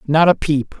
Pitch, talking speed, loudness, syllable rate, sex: 150 Hz, 225 wpm, -16 LUFS, 4.6 syllables/s, male